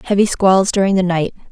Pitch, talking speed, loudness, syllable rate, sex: 185 Hz, 195 wpm, -15 LUFS, 5.7 syllables/s, female